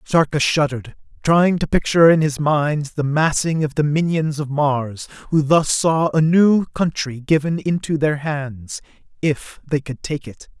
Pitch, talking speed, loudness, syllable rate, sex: 150 Hz, 165 wpm, -18 LUFS, 4.2 syllables/s, male